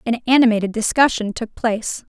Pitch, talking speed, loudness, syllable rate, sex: 230 Hz, 140 wpm, -18 LUFS, 5.8 syllables/s, female